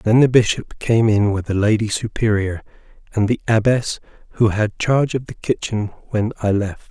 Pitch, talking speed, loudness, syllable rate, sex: 110 Hz, 180 wpm, -19 LUFS, 5.0 syllables/s, male